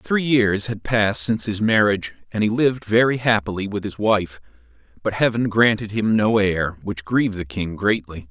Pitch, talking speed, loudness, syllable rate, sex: 105 Hz, 190 wpm, -20 LUFS, 5.1 syllables/s, male